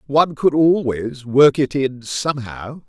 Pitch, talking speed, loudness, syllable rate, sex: 135 Hz, 145 wpm, -18 LUFS, 4.1 syllables/s, male